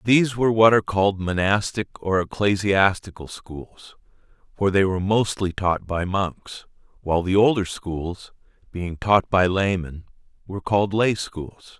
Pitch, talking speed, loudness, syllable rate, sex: 95 Hz, 140 wpm, -21 LUFS, 4.5 syllables/s, male